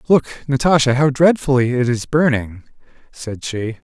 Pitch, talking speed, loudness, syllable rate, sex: 130 Hz, 140 wpm, -17 LUFS, 4.4 syllables/s, male